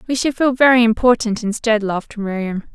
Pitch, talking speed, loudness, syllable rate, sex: 225 Hz, 175 wpm, -17 LUFS, 5.5 syllables/s, female